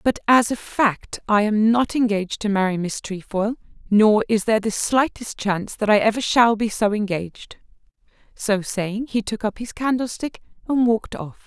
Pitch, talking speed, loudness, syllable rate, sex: 215 Hz, 185 wpm, -21 LUFS, 4.9 syllables/s, female